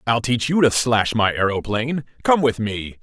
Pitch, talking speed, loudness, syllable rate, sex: 120 Hz, 200 wpm, -19 LUFS, 4.9 syllables/s, male